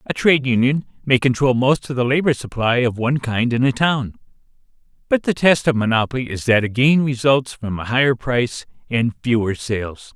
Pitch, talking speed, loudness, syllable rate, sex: 125 Hz, 195 wpm, -18 LUFS, 5.4 syllables/s, male